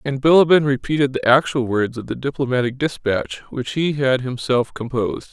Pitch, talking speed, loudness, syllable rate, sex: 130 Hz, 170 wpm, -19 LUFS, 5.2 syllables/s, male